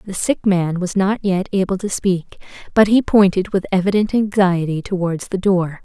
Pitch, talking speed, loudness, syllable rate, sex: 190 Hz, 185 wpm, -17 LUFS, 5.0 syllables/s, female